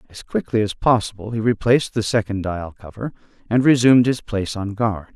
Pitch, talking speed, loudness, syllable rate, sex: 110 Hz, 185 wpm, -20 LUFS, 5.8 syllables/s, male